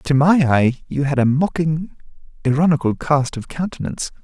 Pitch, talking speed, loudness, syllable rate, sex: 150 Hz, 155 wpm, -18 LUFS, 5.2 syllables/s, male